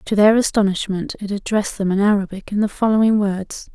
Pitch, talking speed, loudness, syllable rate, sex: 205 Hz, 190 wpm, -18 LUFS, 5.8 syllables/s, female